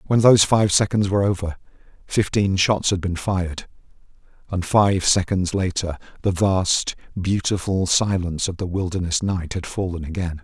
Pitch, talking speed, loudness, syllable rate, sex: 95 Hz, 150 wpm, -21 LUFS, 4.9 syllables/s, male